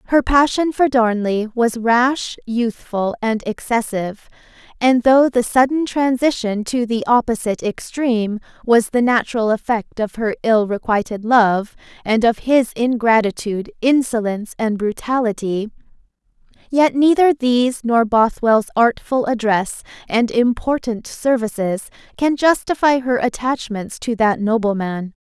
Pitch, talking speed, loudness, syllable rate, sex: 235 Hz, 120 wpm, -18 LUFS, 4.4 syllables/s, female